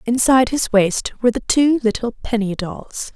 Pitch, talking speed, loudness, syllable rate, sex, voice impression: 230 Hz, 170 wpm, -18 LUFS, 4.8 syllables/s, female, feminine, slightly young, relaxed, powerful, soft, slightly muffled, raspy, refreshing, calm, slightly friendly, slightly reassuring, elegant, lively, slightly sharp, slightly modest